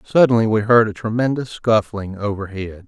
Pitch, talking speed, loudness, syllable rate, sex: 110 Hz, 145 wpm, -18 LUFS, 5.2 syllables/s, male